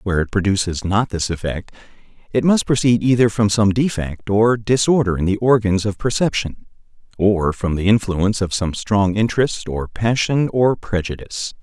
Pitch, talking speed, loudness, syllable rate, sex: 105 Hz, 165 wpm, -18 LUFS, 5.0 syllables/s, male